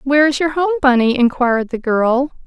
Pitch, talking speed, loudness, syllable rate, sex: 270 Hz, 195 wpm, -15 LUFS, 5.7 syllables/s, female